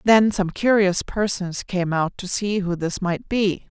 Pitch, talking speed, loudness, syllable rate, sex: 190 Hz, 190 wpm, -22 LUFS, 3.9 syllables/s, female